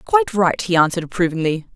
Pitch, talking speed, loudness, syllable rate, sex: 190 Hz, 170 wpm, -18 LUFS, 6.9 syllables/s, female